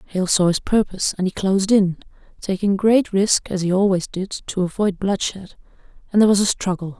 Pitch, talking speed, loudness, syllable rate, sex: 195 Hz, 195 wpm, -19 LUFS, 5.4 syllables/s, female